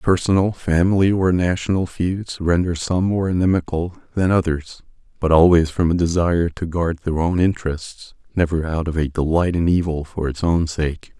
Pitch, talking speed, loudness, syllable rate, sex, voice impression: 85 Hz, 170 wpm, -19 LUFS, 4.9 syllables/s, male, very masculine, very adult-like, slightly thick, cool, sincere, calm, slightly mature